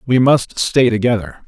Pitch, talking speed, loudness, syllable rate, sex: 120 Hz, 165 wpm, -15 LUFS, 4.6 syllables/s, male